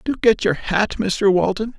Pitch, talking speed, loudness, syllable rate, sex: 200 Hz, 200 wpm, -19 LUFS, 4.3 syllables/s, male